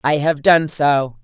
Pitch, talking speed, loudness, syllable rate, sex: 150 Hz, 195 wpm, -16 LUFS, 3.6 syllables/s, female